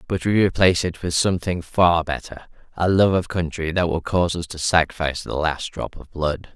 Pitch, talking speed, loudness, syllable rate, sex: 85 Hz, 200 wpm, -21 LUFS, 5.4 syllables/s, male